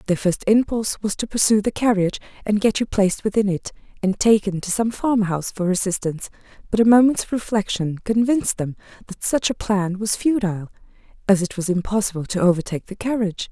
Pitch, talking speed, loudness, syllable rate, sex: 205 Hz, 180 wpm, -20 LUFS, 6.0 syllables/s, female